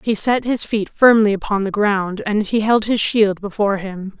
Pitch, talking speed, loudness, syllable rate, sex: 210 Hz, 215 wpm, -17 LUFS, 4.7 syllables/s, female